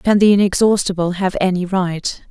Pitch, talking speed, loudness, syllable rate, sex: 190 Hz, 155 wpm, -16 LUFS, 4.9 syllables/s, female